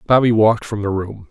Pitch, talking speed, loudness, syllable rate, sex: 105 Hz, 230 wpm, -17 LUFS, 6.0 syllables/s, male